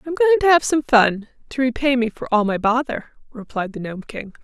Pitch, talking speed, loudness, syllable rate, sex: 250 Hz, 230 wpm, -19 LUFS, 5.1 syllables/s, female